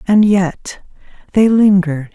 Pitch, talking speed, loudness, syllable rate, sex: 190 Hz, 110 wpm, -13 LUFS, 4.1 syllables/s, female